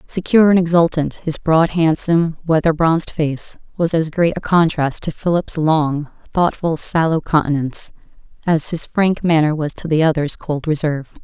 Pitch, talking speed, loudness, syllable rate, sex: 160 Hz, 160 wpm, -17 LUFS, 4.9 syllables/s, female